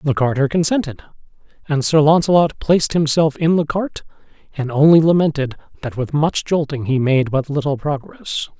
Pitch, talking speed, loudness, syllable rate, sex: 150 Hz, 160 wpm, -17 LUFS, 5.2 syllables/s, male